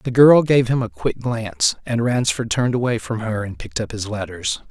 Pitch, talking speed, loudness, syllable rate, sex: 115 Hz, 230 wpm, -19 LUFS, 5.4 syllables/s, male